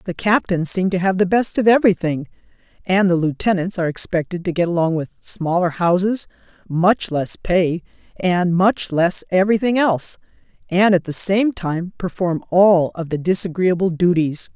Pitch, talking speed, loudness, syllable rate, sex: 180 Hz, 160 wpm, -18 LUFS, 4.9 syllables/s, female